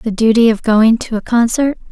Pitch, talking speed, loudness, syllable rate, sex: 225 Hz, 220 wpm, -13 LUFS, 5.1 syllables/s, female